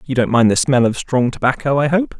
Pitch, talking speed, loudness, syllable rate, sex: 135 Hz, 275 wpm, -16 LUFS, 5.7 syllables/s, male